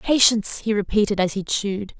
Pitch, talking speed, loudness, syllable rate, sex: 205 Hz, 180 wpm, -20 LUFS, 5.7 syllables/s, female